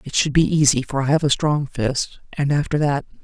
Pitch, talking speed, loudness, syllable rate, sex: 140 Hz, 240 wpm, -20 LUFS, 5.2 syllables/s, female